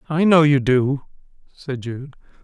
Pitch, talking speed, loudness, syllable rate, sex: 140 Hz, 150 wpm, -18 LUFS, 4.0 syllables/s, male